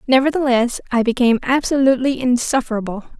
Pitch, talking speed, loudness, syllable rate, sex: 250 Hz, 95 wpm, -17 LUFS, 6.5 syllables/s, female